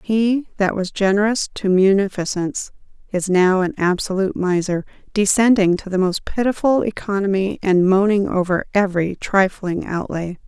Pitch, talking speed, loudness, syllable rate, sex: 195 Hz, 130 wpm, -19 LUFS, 4.9 syllables/s, female